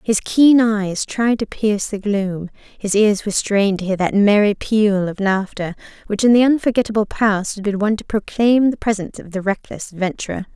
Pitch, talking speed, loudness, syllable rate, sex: 205 Hz, 200 wpm, -18 LUFS, 5.2 syllables/s, female